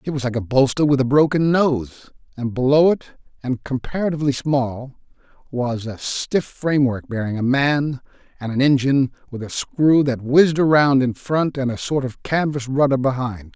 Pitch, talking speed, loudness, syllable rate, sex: 135 Hz, 175 wpm, -19 LUFS, 4.9 syllables/s, male